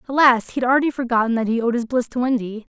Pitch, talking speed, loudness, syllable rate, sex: 240 Hz, 265 wpm, -19 LUFS, 7.3 syllables/s, female